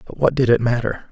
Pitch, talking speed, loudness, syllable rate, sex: 120 Hz, 270 wpm, -18 LUFS, 6.1 syllables/s, male